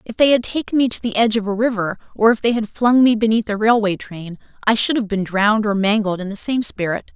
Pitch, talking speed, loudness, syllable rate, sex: 215 Hz, 270 wpm, -18 LUFS, 6.1 syllables/s, female